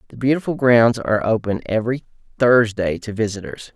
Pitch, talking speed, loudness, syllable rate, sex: 115 Hz, 145 wpm, -19 LUFS, 5.7 syllables/s, male